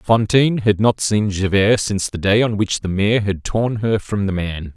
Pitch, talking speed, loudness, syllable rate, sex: 105 Hz, 225 wpm, -18 LUFS, 4.7 syllables/s, male